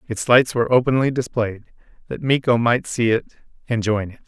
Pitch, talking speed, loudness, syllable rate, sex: 120 Hz, 180 wpm, -19 LUFS, 5.2 syllables/s, male